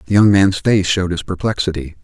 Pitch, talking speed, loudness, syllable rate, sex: 95 Hz, 205 wpm, -16 LUFS, 6.1 syllables/s, male